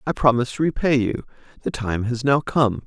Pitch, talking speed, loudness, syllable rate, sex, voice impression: 130 Hz, 210 wpm, -21 LUFS, 5.5 syllables/s, male, masculine, adult-like, tensed, powerful, bright, clear, fluent, intellectual, friendly, reassuring, wild, lively, kind